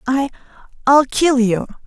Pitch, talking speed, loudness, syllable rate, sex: 260 Hz, 130 wpm, -16 LUFS, 4.1 syllables/s, female